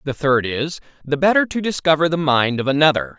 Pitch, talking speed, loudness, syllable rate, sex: 150 Hz, 205 wpm, -18 LUFS, 5.6 syllables/s, male